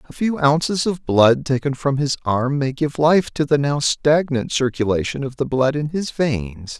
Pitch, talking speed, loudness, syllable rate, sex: 140 Hz, 205 wpm, -19 LUFS, 4.5 syllables/s, male